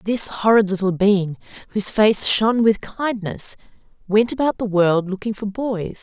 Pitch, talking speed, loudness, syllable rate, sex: 205 Hz, 160 wpm, -19 LUFS, 4.5 syllables/s, female